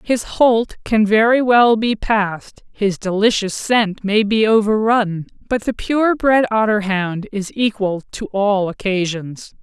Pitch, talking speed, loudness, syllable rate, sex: 210 Hz, 145 wpm, -17 LUFS, 3.8 syllables/s, female